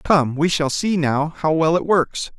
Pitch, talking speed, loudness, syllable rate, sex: 160 Hz, 225 wpm, -19 LUFS, 4.2 syllables/s, male